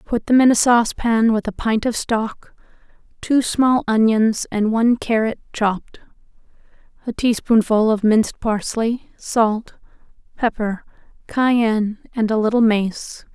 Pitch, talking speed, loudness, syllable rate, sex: 225 Hz, 130 wpm, -18 LUFS, 4.2 syllables/s, female